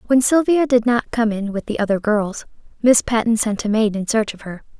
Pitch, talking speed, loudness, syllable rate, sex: 225 Hz, 240 wpm, -18 LUFS, 5.3 syllables/s, female